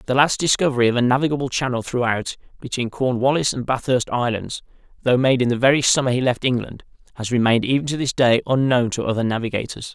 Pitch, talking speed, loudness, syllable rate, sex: 125 Hz, 195 wpm, -20 LUFS, 6.4 syllables/s, male